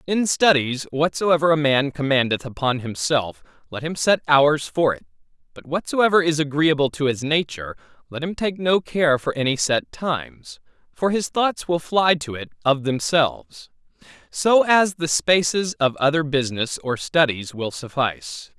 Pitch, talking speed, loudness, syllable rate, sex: 145 Hz, 160 wpm, -20 LUFS, 4.6 syllables/s, male